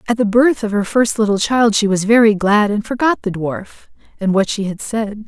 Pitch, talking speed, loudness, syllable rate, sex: 215 Hz, 240 wpm, -16 LUFS, 5.2 syllables/s, female